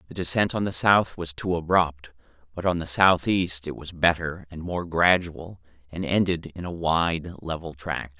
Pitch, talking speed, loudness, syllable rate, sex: 85 Hz, 185 wpm, -24 LUFS, 4.4 syllables/s, male